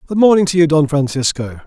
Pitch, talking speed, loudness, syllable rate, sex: 155 Hz, 215 wpm, -14 LUFS, 6.0 syllables/s, male